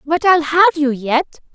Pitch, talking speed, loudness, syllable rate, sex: 310 Hz, 195 wpm, -14 LUFS, 4.7 syllables/s, female